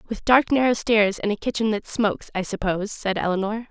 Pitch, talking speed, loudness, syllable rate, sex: 215 Hz, 210 wpm, -22 LUFS, 5.7 syllables/s, female